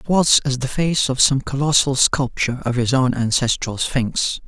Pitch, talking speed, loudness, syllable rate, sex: 130 Hz, 190 wpm, -18 LUFS, 4.6 syllables/s, male